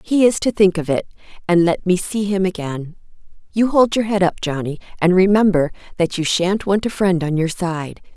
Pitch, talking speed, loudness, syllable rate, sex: 185 Hz, 215 wpm, -18 LUFS, 5.1 syllables/s, female